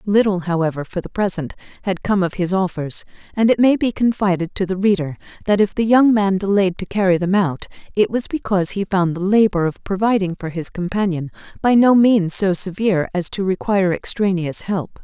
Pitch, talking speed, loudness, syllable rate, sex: 190 Hz, 200 wpm, -18 LUFS, 5.5 syllables/s, female